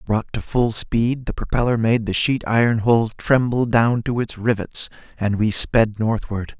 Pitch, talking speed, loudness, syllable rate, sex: 115 Hz, 180 wpm, -20 LUFS, 4.2 syllables/s, male